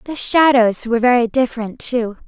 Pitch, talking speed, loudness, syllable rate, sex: 240 Hz, 160 wpm, -16 LUFS, 5.4 syllables/s, female